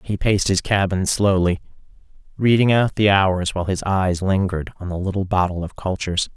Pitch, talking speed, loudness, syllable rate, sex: 95 Hz, 180 wpm, -20 LUFS, 5.5 syllables/s, male